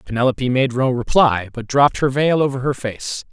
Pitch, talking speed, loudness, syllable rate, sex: 130 Hz, 200 wpm, -18 LUFS, 5.5 syllables/s, male